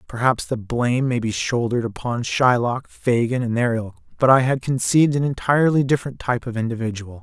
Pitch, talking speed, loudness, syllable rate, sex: 120 Hz, 185 wpm, -20 LUFS, 5.8 syllables/s, male